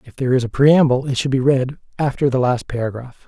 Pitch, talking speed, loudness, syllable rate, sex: 130 Hz, 240 wpm, -18 LUFS, 6.2 syllables/s, male